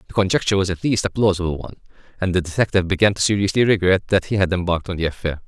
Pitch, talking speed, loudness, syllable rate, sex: 95 Hz, 240 wpm, -19 LUFS, 7.9 syllables/s, male